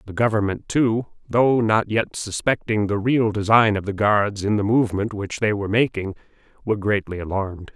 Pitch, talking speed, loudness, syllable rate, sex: 105 Hz, 180 wpm, -21 LUFS, 5.3 syllables/s, male